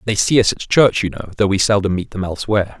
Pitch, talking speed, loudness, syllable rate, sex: 100 Hz, 280 wpm, -17 LUFS, 6.6 syllables/s, male